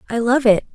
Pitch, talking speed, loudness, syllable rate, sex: 235 Hz, 240 wpm, -16 LUFS, 6.4 syllables/s, female